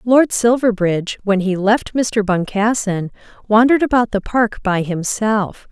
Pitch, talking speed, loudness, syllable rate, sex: 210 Hz, 135 wpm, -16 LUFS, 4.3 syllables/s, female